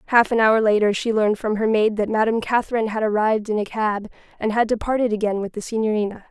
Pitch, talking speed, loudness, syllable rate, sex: 215 Hz, 230 wpm, -20 LUFS, 6.8 syllables/s, female